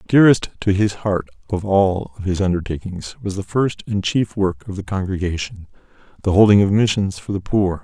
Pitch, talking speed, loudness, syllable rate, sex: 95 Hz, 175 wpm, -19 LUFS, 5.1 syllables/s, male